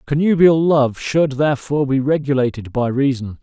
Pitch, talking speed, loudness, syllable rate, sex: 140 Hz, 140 wpm, -17 LUFS, 5.2 syllables/s, male